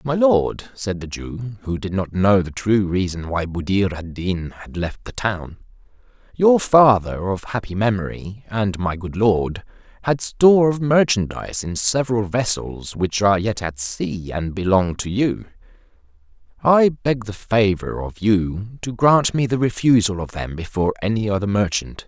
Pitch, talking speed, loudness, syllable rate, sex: 105 Hz, 170 wpm, -20 LUFS, 4.1 syllables/s, male